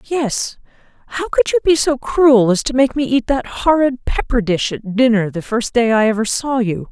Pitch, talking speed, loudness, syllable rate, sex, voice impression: 245 Hz, 215 wpm, -16 LUFS, 4.7 syllables/s, female, feminine, adult-like, fluent, slightly intellectual, slightly friendly, slightly elegant